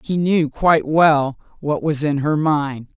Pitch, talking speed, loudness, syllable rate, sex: 150 Hz, 180 wpm, -18 LUFS, 3.9 syllables/s, female